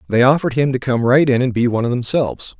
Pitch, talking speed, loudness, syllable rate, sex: 125 Hz, 280 wpm, -16 LUFS, 7.1 syllables/s, male